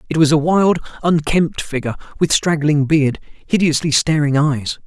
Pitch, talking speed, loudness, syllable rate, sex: 155 Hz, 150 wpm, -16 LUFS, 4.7 syllables/s, male